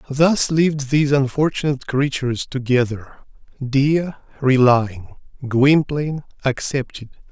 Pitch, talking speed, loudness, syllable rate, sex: 135 Hz, 75 wpm, -19 LUFS, 5.1 syllables/s, male